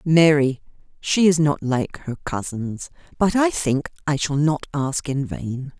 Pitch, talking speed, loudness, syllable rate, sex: 145 Hz, 165 wpm, -21 LUFS, 3.8 syllables/s, female